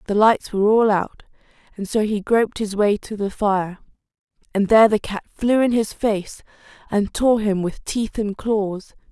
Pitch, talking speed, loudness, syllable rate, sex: 210 Hz, 190 wpm, -20 LUFS, 4.6 syllables/s, female